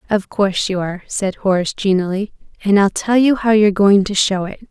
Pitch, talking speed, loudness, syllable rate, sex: 200 Hz, 215 wpm, -16 LUFS, 5.8 syllables/s, female